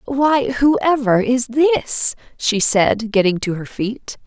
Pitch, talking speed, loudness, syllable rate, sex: 240 Hz, 140 wpm, -17 LUFS, 3.1 syllables/s, female